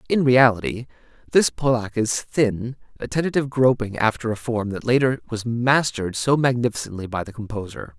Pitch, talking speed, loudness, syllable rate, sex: 120 Hz, 160 wpm, -21 LUFS, 5.5 syllables/s, male